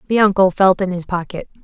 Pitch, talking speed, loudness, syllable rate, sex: 185 Hz, 220 wpm, -16 LUFS, 5.9 syllables/s, female